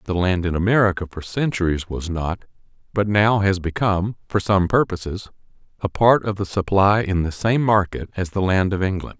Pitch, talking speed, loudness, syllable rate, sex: 95 Hz, 190 wpm, -20 LUFS, 5.2 syllables/s, male